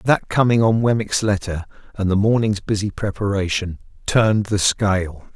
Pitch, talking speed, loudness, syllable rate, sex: 105 Hz, 145 wpm, -19 LUFS, 4.9 syllables/s, male